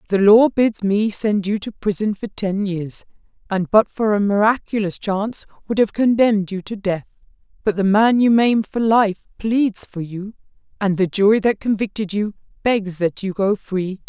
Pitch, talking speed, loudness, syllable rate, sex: 205 Hz, 190 wpm, -19 LUFS, 4.7 syllables/s, female